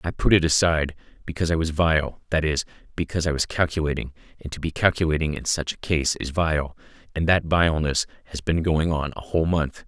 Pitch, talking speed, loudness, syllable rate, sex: 80 Hz, 205 wpm, -23 LUFS, 6.1 syllables/s, male